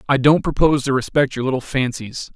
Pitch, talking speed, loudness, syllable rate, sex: 135 Hz, 205 wpm, -18 LUFS, 6.0 syllables/s, male